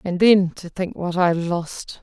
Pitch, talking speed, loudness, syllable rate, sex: 180 Hz, 210 wpm, -20 LUFS, 3.6 syllables/s, female